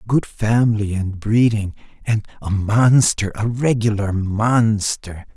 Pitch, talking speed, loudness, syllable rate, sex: 110 Hz, 125 wpm, -18 LUFS, 3.8 syllables/s, male